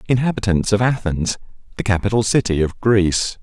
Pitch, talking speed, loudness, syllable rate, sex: 105 Hz, 140 wpm, -18 LUFS, 5.6 syllables/s, male